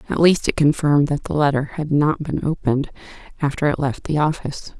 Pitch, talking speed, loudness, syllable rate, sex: 145 Hz, 200 wpm, -20 LUFS, 5.9 syllables/s, female